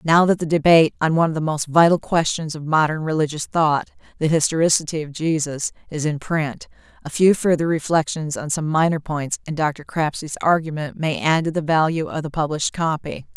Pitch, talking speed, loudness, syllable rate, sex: 155 Hz, 185 wpm, -20 LUFS, 5.5 syllables/s, female